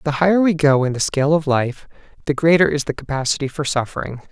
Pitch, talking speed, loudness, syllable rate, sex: 150 Hz, 225 wpm, -18 LUFS, 6.4 syllables/s, male